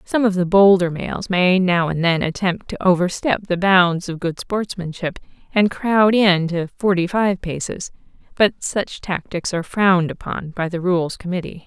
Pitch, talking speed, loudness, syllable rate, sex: 185 Hz, 175 wpm, -19 LUFS, 4.5 syllables/s, female